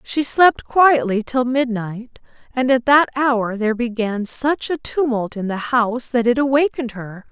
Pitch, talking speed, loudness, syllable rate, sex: 245 Hz, 170 wpm, -18 LUFS, 4.4 syllables/s, female